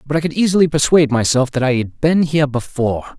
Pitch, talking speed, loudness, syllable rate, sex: 145 Hz, 225 wpm, -16 LUFS, 6.8 syllables/s, male